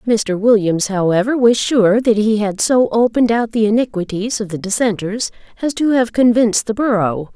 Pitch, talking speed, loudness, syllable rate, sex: 220 Hz, 180 wpm, -15 LUFS, 5.1 syllables/s, female